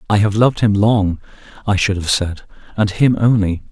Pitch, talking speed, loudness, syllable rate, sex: 100 Hz, 195 wpm, -16 LUFS, 5.2 syllables/s, male